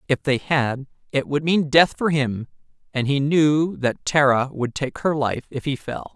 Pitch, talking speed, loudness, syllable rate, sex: 140 Hz, 205 wpm, -21 LUFS, 4.3 syllables/s, male